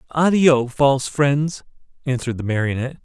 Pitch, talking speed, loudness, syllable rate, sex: 135 Hz, 120 wpm, -19 LUFS, 5.5 syllables/s, male